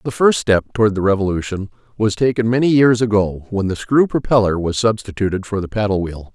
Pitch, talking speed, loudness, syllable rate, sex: 105 Hz, 200 wpm, -17 LUFS, 5.8 syllables/s, male